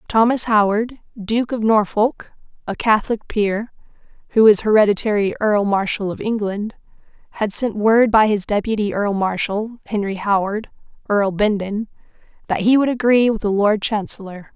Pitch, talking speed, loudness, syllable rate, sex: 210 Hz, 145 wpm, -18 LUFS, 4.8 syllables/s, female